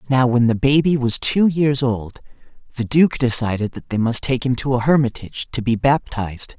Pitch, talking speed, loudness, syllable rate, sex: 125 Hz, 200 wpm, -18 LUFS, 5.2 syllables/s, male